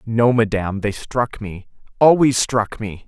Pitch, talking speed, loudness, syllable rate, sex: 110 Hz, 155 wpm, -18 LUFS, 4.1 syllables/s, male